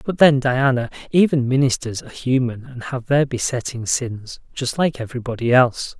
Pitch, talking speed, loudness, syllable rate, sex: 130 Hz, 160 wpm, -19 LUFS, 5.2 syllables/s, male